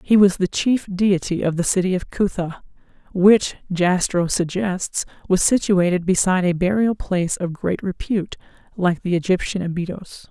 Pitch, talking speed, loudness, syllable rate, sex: 185 Hz, 150 wpm, -20 LUFS, 4.9 syllables/s, female